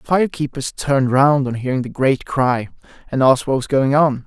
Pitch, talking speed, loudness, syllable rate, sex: 135 Hz, 225 wpm, -17 LUFS, 5.2 syllables/s, male